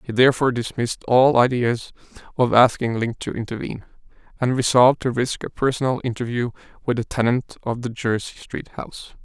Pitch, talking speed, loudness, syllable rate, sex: 120 Hz, 160 wpm, -21 LUFS, 5.7 syllables/s, male